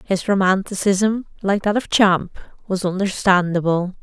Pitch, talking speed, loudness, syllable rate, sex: 190 Hz, 120 wpm, -19 LUFS, 4.5 syllables/s, female